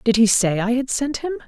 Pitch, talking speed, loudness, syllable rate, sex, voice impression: 240 Hz, 285 wpm, -19 LUFS, 5.3 syllables/s, female, feminine, very adult-like, slightly fluent, intellectual, elegant